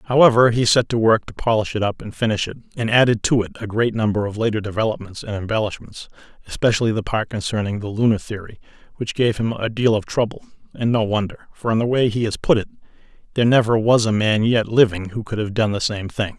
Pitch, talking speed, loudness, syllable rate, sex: 110 Hz, 225 wpm, -20 LUFS, 6.2 syllables/s, male